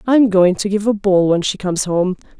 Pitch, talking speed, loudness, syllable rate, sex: 195 Hz, 275 wpm, -16 LUFS, 5.8 syllables/s, female